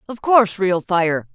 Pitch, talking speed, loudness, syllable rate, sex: 190 Hz, 180 wpm, -17 LUFS, 4.4 syllables/s, female